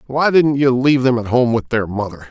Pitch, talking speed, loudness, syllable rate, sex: 125 Hz, 260 wpm, -16 LUFS, 5.6 syllables/s, male